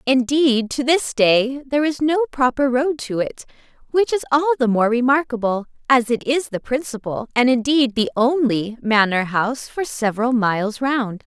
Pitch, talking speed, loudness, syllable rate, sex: 250 Hz, 170 wpm, -19 LUFS, 4.7 syllables/s, female